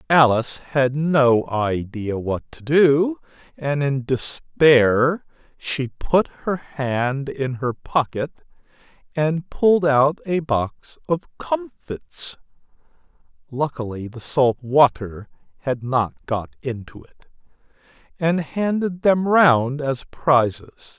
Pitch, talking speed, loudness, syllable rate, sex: 140 Hz, 110 wpm, -21 LUFS, 3.0 syllables/s, male